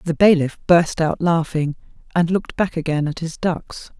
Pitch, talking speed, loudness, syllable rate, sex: 165 Hz, 180 wpm, -19 LUFS, 4.8 syllables/s, female